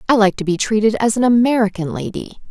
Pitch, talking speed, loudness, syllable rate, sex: 210 Hz, 215 wpm, -16 LUFS, 6.5 syllables/s, female